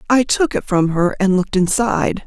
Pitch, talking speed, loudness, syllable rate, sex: 205 Hz, 210 wpm, -17 LUFS, 5.4 syllables/s, female